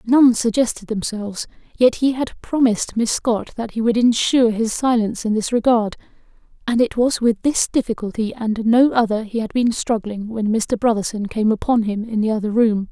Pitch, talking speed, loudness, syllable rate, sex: 225 Hz, 190 wpm, -19 LUFS, 5.2 syllables/s, female